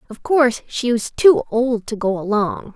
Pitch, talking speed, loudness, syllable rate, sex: 235 Hz, 195 wpm, -18 LUFS, 4.6 syllables/s, female